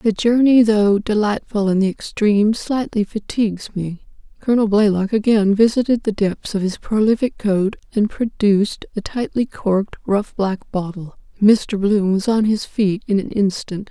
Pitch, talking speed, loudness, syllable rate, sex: 210 Hz, 160 wpm, -18 LUFS, 4.6 syllables/s, female